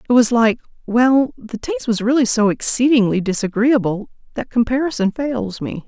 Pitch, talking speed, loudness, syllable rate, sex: 235 Hz, 145 wpm, -17 LUFS, 5.1 syllables/s, female